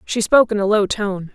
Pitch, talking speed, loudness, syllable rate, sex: 205 Hz, 270 wpm, -17 LUFS, 5.7 syllables/s, female